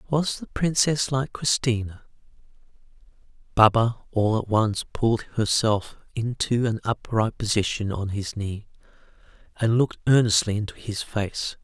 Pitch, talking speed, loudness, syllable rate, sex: 115 Hz, 125 wpm, -24 LUFS, 4.4 syllables/s, male